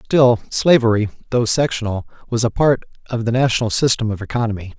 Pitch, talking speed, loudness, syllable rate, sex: 120 Hz, 165 wpm, -18 LUFS, 5.7 syllables/s, male